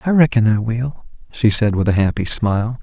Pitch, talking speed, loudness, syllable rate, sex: 115 Hz, 210 wpm, -17 LUFS, 5.3 syllables/s, male